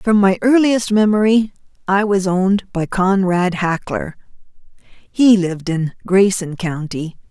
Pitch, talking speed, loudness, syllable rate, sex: 190 Hz, 125 wpm, -16 LUFS, 4.0 syllables/s, female